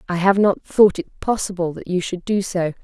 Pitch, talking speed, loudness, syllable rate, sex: 185 Hz, 235 wpm, -19 LUFS, 5.0 syllables/s, female